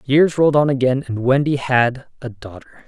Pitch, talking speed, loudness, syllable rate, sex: 130 Hz, 190 wpm, -17 LUFS, 5.0 syllables/s, male